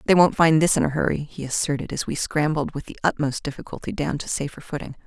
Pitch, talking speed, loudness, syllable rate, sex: 150 Hz, 235 wpm, -23 LUFS, 6.3 syllables/s, female